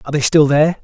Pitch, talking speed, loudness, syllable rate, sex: 150 Hz, 285 wpm, -13 LUFS, 8.2 syllables/s, male